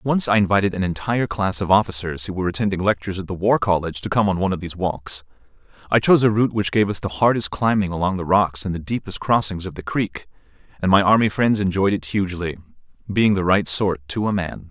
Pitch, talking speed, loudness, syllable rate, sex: 95 Hz, 230 wpm, -20 LUFS, 6.4 syllables/s, male